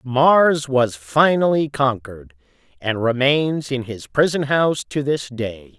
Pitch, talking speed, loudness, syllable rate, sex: 135 Hz, 135 wpm, -19 LUFS, 3.9 syllables/s, male